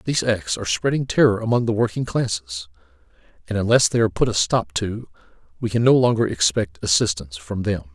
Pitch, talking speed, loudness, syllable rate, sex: 100 Hz, 190 wpm, -20 LUFS, 6.1 syllables/s, male